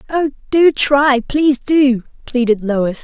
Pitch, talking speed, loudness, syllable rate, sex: 265 Hz, 140 wpm, -14 LUFS, 3.7 syllables/s, female